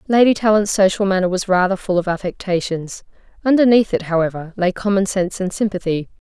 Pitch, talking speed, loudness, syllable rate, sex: 190 Hz, 155 wpm, -18 LUFS, 6.0 syllables/s, female